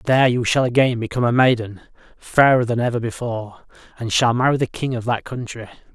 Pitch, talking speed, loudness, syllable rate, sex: 120 Hz, 190 wpm, -19 LUFS, 6.1 syllables/s, male